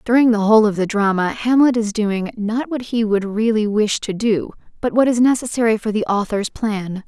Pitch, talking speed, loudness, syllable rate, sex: 220 Hz, 210 wpm, -18 LUFS, 5.2 syllables/s, female